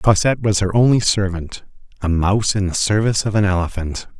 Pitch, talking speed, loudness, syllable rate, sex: 100 Hz, 185 wpm, -18 LUFS, 6.0 syllables/s, male